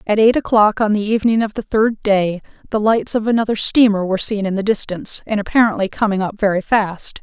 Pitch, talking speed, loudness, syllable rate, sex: 210 Hz, 215 wpm, -17 LUFS, 5.9 syllables/s, female